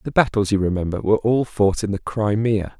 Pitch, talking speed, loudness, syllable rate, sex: 105 Hz, 215 wpm, -20 LUFS, 5.6 syllables/s, male